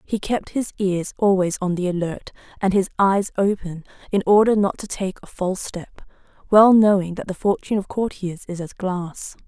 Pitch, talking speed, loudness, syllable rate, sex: 190 Hz, 190 wpm, -21 LUFS, 5.0 syllables/s, female